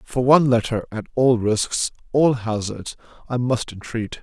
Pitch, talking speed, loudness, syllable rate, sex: 120 Hz, 155 wpm, -21 LUFS, 4.3 syllables/s, male